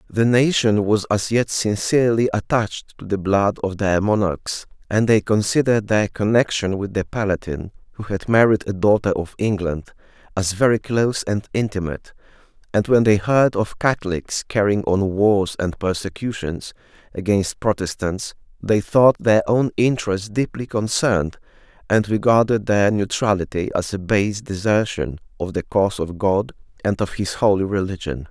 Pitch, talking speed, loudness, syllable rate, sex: 100 Hz, 150 wpm, -20 LUFS, 4.9 syllables/s, male